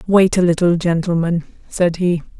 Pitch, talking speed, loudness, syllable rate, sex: 175 Hz, 150 wpm, -17 LUFS, 4.8 syllables/s, female